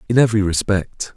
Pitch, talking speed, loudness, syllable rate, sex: 105 Hz, 155 wpm, -18 LUFS, 6.2 syllables/s, male